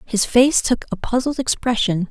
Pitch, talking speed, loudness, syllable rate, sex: 235 Hz, 170 wpm, -18 LUFS, 4.7 syllables/s, female